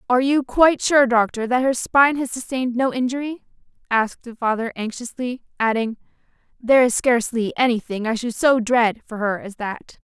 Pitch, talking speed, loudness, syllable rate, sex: 240 Hz, 175 wpm, -20 LUFS, 5.5 syllables/s, female